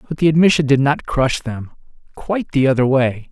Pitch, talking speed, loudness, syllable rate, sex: 140 Hz, 200 wpm, -16 LUFS, 5.5 syllables/s, male